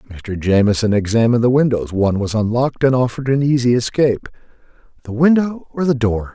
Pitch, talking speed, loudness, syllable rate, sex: 120 Hz, 170 wpm, -16 LUFS, 6.5 syllables/s, male